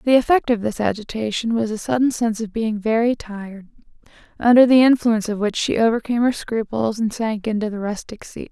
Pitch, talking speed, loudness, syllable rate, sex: 225 Hz, 195 wpm, -19 LUFS, 5.9 syllables/s, female